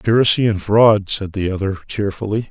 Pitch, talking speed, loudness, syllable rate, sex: 100 Hz, 165 wpm, -17 LUFS, 6.1 syllables/s, male